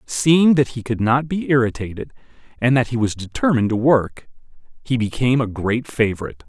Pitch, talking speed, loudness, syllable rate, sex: 120 Hz, 175 wpm, -19 LUFS, 5.7 syllables/s, male